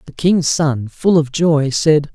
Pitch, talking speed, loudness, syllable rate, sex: 150 Hz, 195 wpm, -15 LUFS, 3.5 syllables/s, male